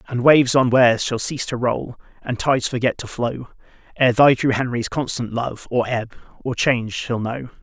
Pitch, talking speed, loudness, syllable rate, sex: 125 Hz, 195 wpm, -19 LUFS, 5.2 syllables/s, male